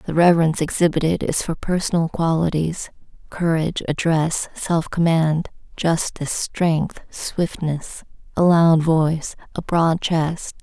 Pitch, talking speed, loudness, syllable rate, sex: 165 Hz, 115 wpm, -20 LUFS, 4.1 syllables/s, female